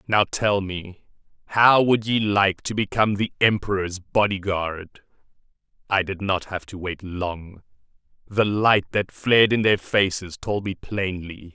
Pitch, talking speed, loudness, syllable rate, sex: 100 Hz, 155 wpm, -22 LUFS, 4.1 syllables/s, male